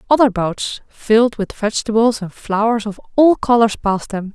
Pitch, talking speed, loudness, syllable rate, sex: 220 Hz, 165 wpm, -17 LUFS, 5.1 syllables/s, female